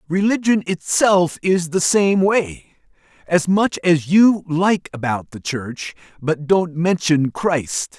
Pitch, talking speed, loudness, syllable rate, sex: 175 Hz, 135 wpm, -18 LUFS, 3.3 syllables/s, male